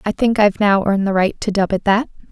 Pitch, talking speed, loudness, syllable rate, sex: 205 Hz, 285 wpm, -16 LUFS, 6.4 syllables/s, female